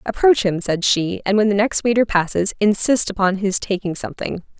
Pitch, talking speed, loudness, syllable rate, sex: 200 Hz, 195 wpm, -18 LUFS, 5.3 syllables/s, female